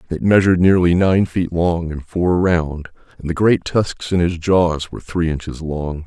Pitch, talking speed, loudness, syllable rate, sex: 85 Hz, 200 wpm, -17 LUFS, 4.5 syllables/s, male